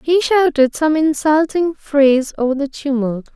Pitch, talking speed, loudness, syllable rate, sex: 290 Hz, 145 wpm, -16 LUFS, 4.4 syllables/s, female